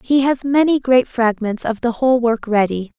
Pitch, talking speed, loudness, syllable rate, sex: 240 Hz, 200 wpm, -17 LUFS, 4.9 syllables/s, female